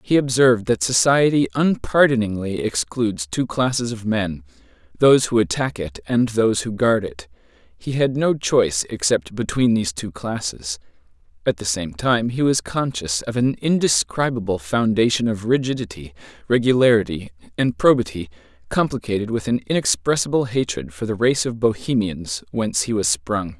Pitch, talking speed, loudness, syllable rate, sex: 110 Hz, 145 wpm, -20 LUFS, 5.0 syllables/s, male